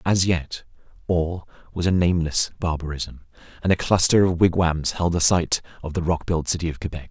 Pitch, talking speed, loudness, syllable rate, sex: 85 Hz, 185 wpm, -22 LUFS, 5.3 syllables/s, male